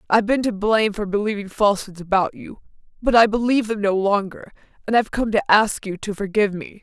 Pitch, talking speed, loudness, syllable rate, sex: 205 Hz, 210 wpm, -20 LUFS, 6.4 syllables/s, female